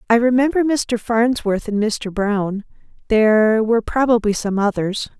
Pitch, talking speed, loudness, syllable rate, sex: 225 Hz, 140 wpm, -18 LUFS, 4.5 syllables/s, female